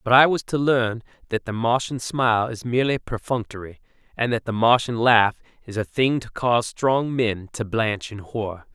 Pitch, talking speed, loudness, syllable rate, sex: 115 Hz, 190 wpm, -22 LUFS, 4.9 syllables/s, male